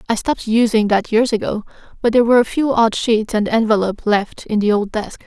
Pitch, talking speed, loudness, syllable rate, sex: 220 Hz, 230 wpm, -17 LUFS, 5.9 syllables/s, female